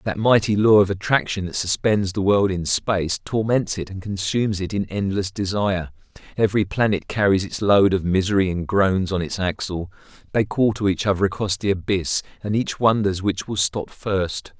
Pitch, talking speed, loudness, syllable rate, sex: 100 Hz, 190 wpm, -21 LUFS, 5.1 syllables/s, male